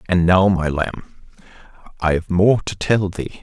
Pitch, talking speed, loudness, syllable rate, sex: 90 Hz, 160 wpm, -18 LUFS, 4.1 syllables/s, male